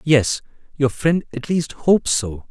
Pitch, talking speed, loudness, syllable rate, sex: 140 Hz, 145 wpm, -20 LUFS, 4.0 syllables/s, male